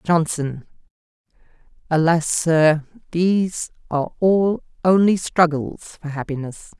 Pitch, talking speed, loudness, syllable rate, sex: 165 Hz, 90 wpm, -20 LUFS, 3.8 syllables/s, female